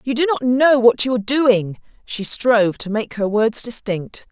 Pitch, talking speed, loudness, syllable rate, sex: 230 Hz, 210 wpm, -17 LUFS, 4.6 syllables/s, female